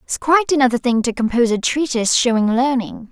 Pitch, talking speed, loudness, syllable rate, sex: 250 Hz, 190 wpm, -17 LUFS, 6.3 syllables/s, female